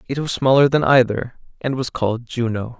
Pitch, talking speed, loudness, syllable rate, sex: 125 Hz, 195 wpm, -19 LUFS, 5.4 syllables/s, male